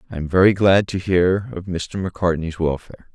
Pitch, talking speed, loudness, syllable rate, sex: 90 Hz, 190 wpm, -19 LUFS, 5.6 syllables/s, male